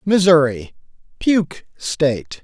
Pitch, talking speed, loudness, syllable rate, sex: 165 Hz, 75 wpm, -17 LUFS, 3.4 syllables/s, male